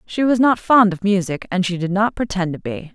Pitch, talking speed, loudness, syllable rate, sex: 195 Hz, 265 wpm, -18 LUFS, 5.4 syllables/s, female